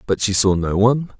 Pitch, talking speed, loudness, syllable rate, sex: 105 Hz, 250 wpm, -17 LUFS, 5.8 syllables/s, male